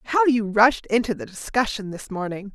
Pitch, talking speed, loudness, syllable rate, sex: 225 Hz, 190 wpm, -22 LUFS, 5.3 syllables/s, female